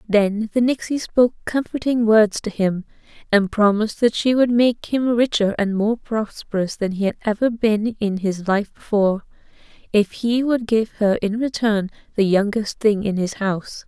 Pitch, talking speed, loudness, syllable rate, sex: 215 Hz, 175 wpm, -20 LUFS, 4.7 syllables/s, female